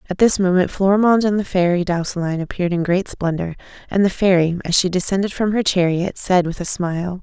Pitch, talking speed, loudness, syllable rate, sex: 185 Hz, 210 wpm, -18 LUFS, 6.0 syllables/s, female